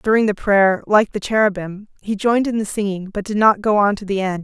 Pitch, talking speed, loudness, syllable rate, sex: 205 Hz, 255 wpm, -18 LUFS, 5.7 syllables/s, female